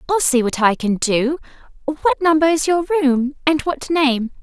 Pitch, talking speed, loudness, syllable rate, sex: 285 Hz, 190 wpm, -17 LUFS, 4.5 syllables/s, female